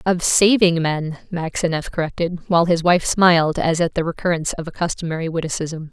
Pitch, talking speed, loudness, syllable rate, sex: 170 Hz, 170 wpm, -19 LUFS, 5.6 syllables/s, female